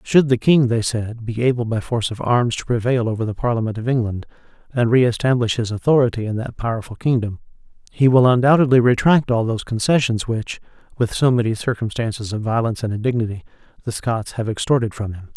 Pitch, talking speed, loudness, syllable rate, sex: 115 Hz, 190 wpm, -19 LUFS, 6.0 syllables/s, male